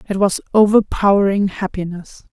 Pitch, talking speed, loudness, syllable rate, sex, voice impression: 195 Hz, 100 wpm, -16 LUFS, 5.1 syllables/s, female, feminine, adult-like, tensed, powerful, slightly bright, clear, intellectual, calm, friendly, reassuring, lively, slightly sharp